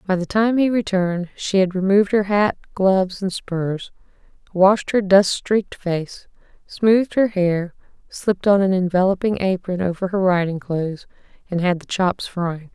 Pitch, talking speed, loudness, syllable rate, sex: 190 Hz, 165 wpm, -19 LUFS, 4.7 syllables/s, female